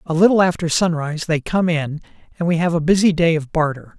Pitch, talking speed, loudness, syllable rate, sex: 165 Hz, 225 wpm, -18 LUFS, 6.0 syllables/s, male